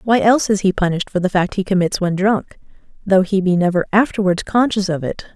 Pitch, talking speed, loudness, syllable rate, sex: 190 Hz, 225 wpm, -17 LUFS, 6.0 syllables/s, female